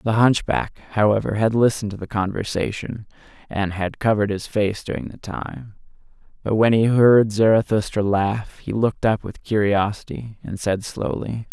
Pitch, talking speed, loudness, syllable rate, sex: 105 Hz, 155 wpm, -21 LUFS, 4.8 syllables/s, male